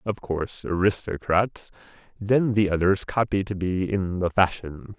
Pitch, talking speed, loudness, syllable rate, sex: 95 Hz, 145 wpm, -24 LUFS, 4.4 syllables/s, male